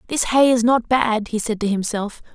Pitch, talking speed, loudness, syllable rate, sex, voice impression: 230 Hz, 230 wpm, -19 LUFS, 4.9 syllables/s, female, very feminine, slightly adult-like, thin, slightly tensed, slightly powerful, bright, hard, very clear, very fluent, slightly raspy, cute, slightly intellectual, very refreshing, sincere, slightly calm, friendly, reassuring, very unique, elegant, slightly wild, sweet, very lively, strict, intense, light